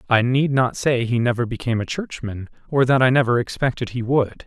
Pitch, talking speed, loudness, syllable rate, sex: 125 Hz, 215 wpm, -20 LUFS, 5.6 syllables/s, male